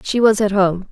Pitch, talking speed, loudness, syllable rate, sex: 200 Hz, 260 wpm, -16 LUFS, 4.9 syllables/s, female